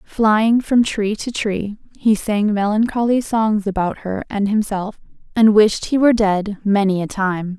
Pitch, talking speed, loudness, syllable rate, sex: 210 Hz, 165 wpm, -18 LUFS, 4.1 syllables/s, female